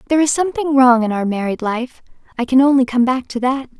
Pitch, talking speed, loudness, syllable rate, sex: 255 Hz, 220 wpm, -16 LUFS, 6.3 syllables/s, female